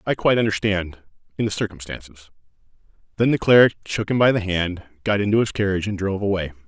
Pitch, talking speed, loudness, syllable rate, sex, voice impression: 100 Hz, 180 wpm, -20 LUFS, 6.7 syllables/s, male, masculine, adult-like, middle-aged, thick, very tensed, powerful, very bright, slightly hard, very clear, very fluent, very cool, intellectual, very refreshing, sincere, very calm, very mature, very friendly, very reassuring, very unique, very elegant, slightly wild, very sweet, very lively, very kind